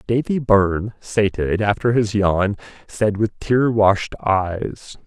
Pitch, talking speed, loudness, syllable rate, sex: 105 Hz, 120 wpm, -19 LUFS, 3.8 syllables/s, male